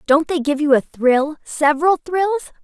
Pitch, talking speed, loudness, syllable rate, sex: 305 Hz, 160 wpm, -17 LUFS, 4.5 syllables/s, female